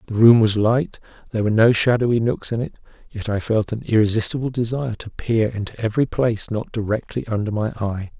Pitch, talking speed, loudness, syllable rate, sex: 110 Hz, 200 wpm, -20 LUFS, 6.1 syllables/s, male